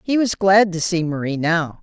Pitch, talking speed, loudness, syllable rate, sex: 180 Hz, 230 wpm, -18 LUFS, 4.7 syllables/s, female